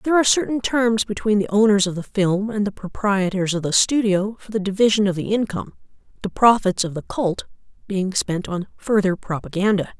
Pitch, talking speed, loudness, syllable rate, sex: 200 Hz, 190 wpm, -20 LUFS, 5.6 syllables/s, female